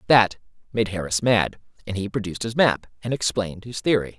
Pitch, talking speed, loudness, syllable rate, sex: 105 Hz, 185 wpm, -23 LUFS, 5.8 syllables/s, male